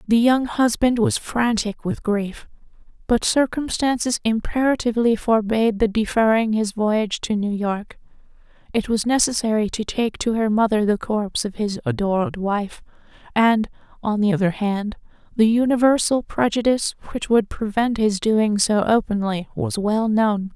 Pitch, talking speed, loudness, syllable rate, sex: 220 Hz, 145 wpm, -20 LUFS, 4.7 syllables/s, female